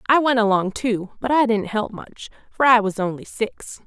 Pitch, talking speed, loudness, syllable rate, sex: 220 Hz, 200 wpm, -20 LUFS, 4.7 syllables/s, female